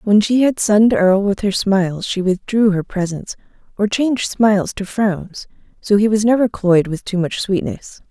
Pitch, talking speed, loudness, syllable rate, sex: 205 Hz, 190 wpm, -16 LUFS, 5.0 syllables/s, female